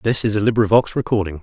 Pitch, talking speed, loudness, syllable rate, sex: 105 Hz, 210 wpm, -18 LUFS, 6.9 syllables/s, male